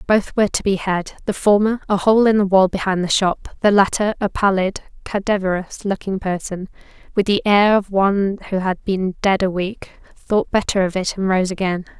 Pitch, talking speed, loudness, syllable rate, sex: 195 Hz, 200 wpm, -18 LUFS, 5.1 syllables/s, female